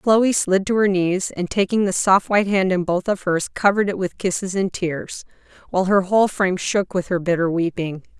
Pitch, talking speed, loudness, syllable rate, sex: 190 Hz, 220 wpm, -20 LUFS, 5.3 syllables/s, female